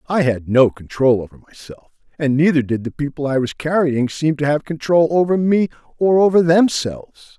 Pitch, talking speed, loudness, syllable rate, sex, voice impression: 150 Hz, 185 wpm, -17 LUFS, 5.1 syllables/s, male, masculine, slightly old, relaxed, slightly weak, slightly hard, muffled, slightly raspy, slightly sincere, mature, reassuring, wild, strict